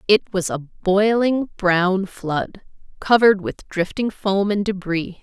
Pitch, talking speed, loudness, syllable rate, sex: 195 Hz, 140 wpm, -20 LUFS, 3.6 syllables/s, female